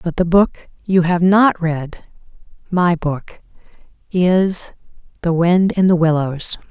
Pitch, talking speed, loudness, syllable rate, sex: 175 Hz, 125 wpm, -16 LUFS, 3.5 syllables/s, female